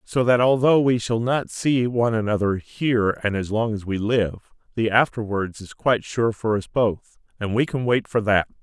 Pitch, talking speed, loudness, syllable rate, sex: 115 Hz, 210 wpm, -22 LUFS, 4.9 syllables/s, male